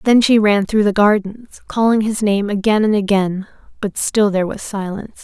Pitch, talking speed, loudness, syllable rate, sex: 205 Hz, 195 wpm, -16 LUFS, 5.1 syllables/s, female